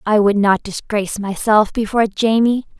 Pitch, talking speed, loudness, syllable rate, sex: 210 Hz, 150 wpm, -16 LUFS, 5.3 syllables/s, female